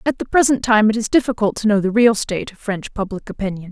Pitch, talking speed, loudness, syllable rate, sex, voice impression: 215 Hz, 260 wpm, -18 LUFS, 6.4 syllables/s, female, feminine, adult-like, clear, fluent, intellectual, calm, slightly friendly, slightly reassuring, elegant, slightly strict